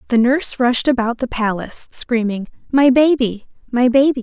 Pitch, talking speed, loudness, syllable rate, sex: 245 Hz, 155 wpm, -17 LUFS, 5.1 syllables/s, female